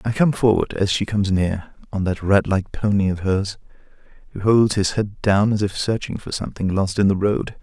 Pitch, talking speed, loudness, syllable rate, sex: 100 Hz, 220 wpm, -20 LUFS, 5.1 syllables/s, male